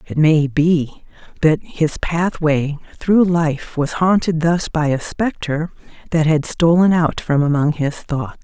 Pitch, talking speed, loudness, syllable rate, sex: 160 Hz, 155 wpm, -17 LUFS, 3.8 syllables/s, female